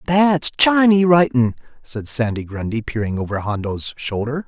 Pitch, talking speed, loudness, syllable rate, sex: 135 Hz, 135 wpm, -18 LUFS, 4.2 syllables/s, male